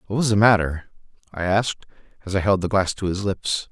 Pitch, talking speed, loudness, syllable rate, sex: 95 Hz, 225 wpm, -21 LUFS, 6.2 syllables/s, male